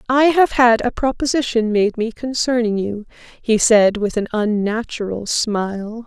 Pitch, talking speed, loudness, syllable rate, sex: 225 Hz, 150 wpm, -18 LUFS, 4.3 syllables/s, female